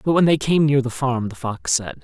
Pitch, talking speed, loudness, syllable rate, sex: 130 Hz, 295 wpm, -20 LUFS, 5.2 syllables/s, male